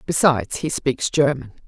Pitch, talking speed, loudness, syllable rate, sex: 140 Hz, 145 wpm, -20 LUFS, 4.9 syllables/s, female